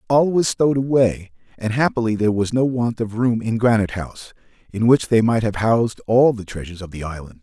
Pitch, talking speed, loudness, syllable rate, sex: 115 Hz, 220 wpm, -19 LUFS, 6.0 syllables/s, male